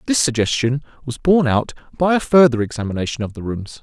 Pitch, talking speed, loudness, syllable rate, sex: 135 Hz, 190 wpm, -18 LUFS, 6.2 syllables/s, male